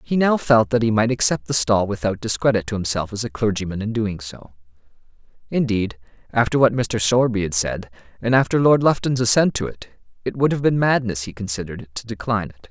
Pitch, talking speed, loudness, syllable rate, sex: 110 Hz, 205 wpm, -20 LUFS, 5.9 syllables/s, male